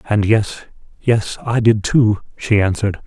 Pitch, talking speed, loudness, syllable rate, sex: 105 Hz, 120 wpm, -17 LUFS, 4.2 syllables/s, male